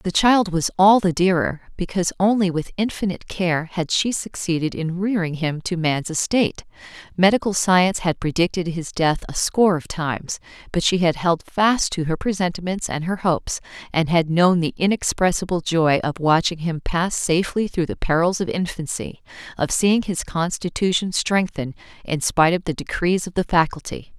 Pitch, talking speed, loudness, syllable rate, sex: 175 Hz, 175 wpm, -21 LUFS, 5.1 syllables/s, female